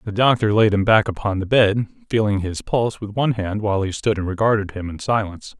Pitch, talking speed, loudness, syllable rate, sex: 105 Hz, 235 wpm, -20 LUFS, 6.1 syllables/s, male